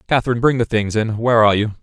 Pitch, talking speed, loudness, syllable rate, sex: 115 Hz, 265 wpm, -17 LUFS, 8.0 syllables/s, male